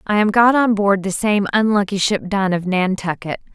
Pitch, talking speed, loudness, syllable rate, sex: 200 Hz, 205 wpm, -17 LUFS, 5.0 syllables/s, female